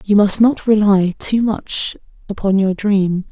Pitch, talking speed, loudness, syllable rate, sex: 200 Hz, 165 wpm, -15 LUFS, 3.5 syllables/s, female